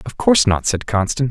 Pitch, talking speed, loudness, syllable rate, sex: 120 Hz, 230 wpm, -17 LUFS, 6.5 syllables/s, male